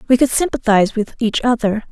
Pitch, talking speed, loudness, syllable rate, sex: 230 Hz, 190 wpm, -16 LUFS, 6.3 syllables/s, female